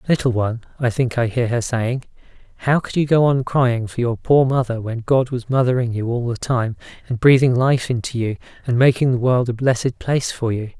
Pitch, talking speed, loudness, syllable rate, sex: 125 Hz, 220 wpm, -19 LUFS, 5.4 syllables/s, male